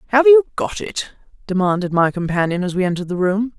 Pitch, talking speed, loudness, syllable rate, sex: 195 Hz, 200 wpm, -18 LUFS, 6.1 syllables/s, female